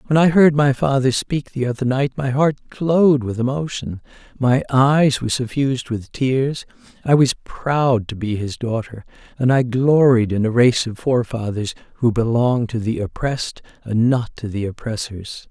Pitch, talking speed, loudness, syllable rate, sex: 125 Hz, 175 wpm, -19 LUFS, 4.7 syllables/s, male